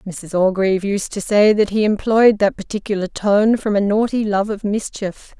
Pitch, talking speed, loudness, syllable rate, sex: 205 Hz, 190 wpm, -17 LUFS, 4.8 syllables/s, female